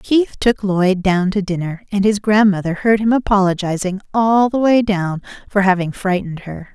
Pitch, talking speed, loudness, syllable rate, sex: 200 Hz, 180 wpm, -16 LUFS, 4.9 syllables/s, female